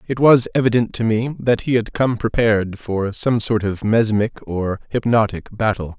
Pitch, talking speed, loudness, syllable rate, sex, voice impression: 110 Hz, 180 wpm, -18 LUFS, 4.8 syllables/s, male, masculine, adult-like, slightly tensed, slightly powerful, muffled, slightly halting, intellectual, slightly mature, friendly, slightly wild, lively, slightly kind